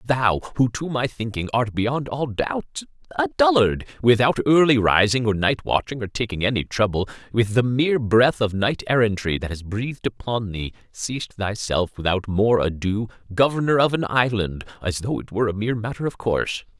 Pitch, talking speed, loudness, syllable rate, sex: 115 Hz, 180 wpm, -22 LUFS, 5.1 syllables/s, male